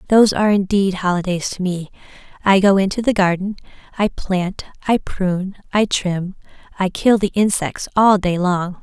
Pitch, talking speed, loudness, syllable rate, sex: 190 Hz, 165 wpm, -18 LUFS, 4.9 syllables/s, female